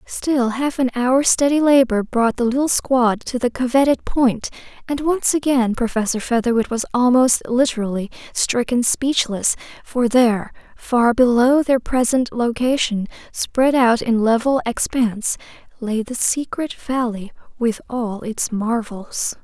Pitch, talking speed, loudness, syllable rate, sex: 245 Hz, 135 wpm, -18 LUFS, 4.2 syllables/s, female